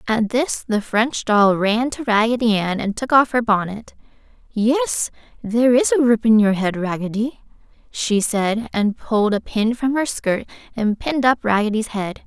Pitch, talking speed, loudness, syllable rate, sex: 225 Hz, 180 wpm, -19 LUFS, 4.5 syllables/s, female